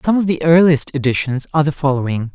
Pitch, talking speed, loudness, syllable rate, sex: 145 Hz, 205 wpm, -16 LUFS, 6.7 syllables/s, male